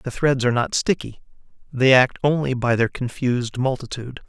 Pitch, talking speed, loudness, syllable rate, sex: 130 Hz, 170 wpm, -20 LUFS, 5.5 syllables/s, male